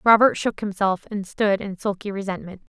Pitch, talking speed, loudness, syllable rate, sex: 200 Hz, 175 wpm, -23 LUFS, 5.2 syllables/s, female